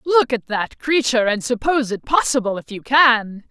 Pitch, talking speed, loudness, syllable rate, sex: 245 Hz, 190 wpm, -18 LUFS, 5.0 syllables/s, female